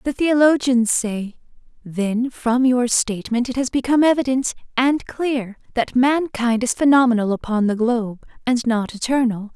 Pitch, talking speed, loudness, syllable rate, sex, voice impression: 245 Hz, 145 wpm, -19 LUFS, 4.6 syllables/s, female, very feminine, young, slightly adult-like, very thin, slightly relaxed, very weak, slightly dark, slightly hard, clear, fluent, slightly raspy, very cute, intellectual, refreshing, sincere, very calm, reassuring, very unique, elegant, sweet, strict, intense